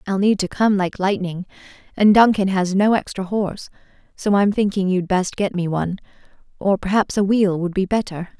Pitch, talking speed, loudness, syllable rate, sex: 195 Hz, 185 wpm, -19 LUFS, 5.3 syllables/s, female